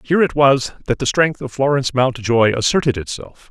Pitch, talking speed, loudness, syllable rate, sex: 130 Hz, 190 wpm, -17 LUFS, 5.5 syllables/s, male